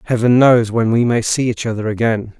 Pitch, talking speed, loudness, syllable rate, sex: 115 Hz, 225 wpm, -15 LUFS, 5.5 syllables/s, male